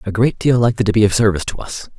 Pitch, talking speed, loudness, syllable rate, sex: 105 Hz, 300 wpm, -16 LUFS, 7.7 syllables/s, male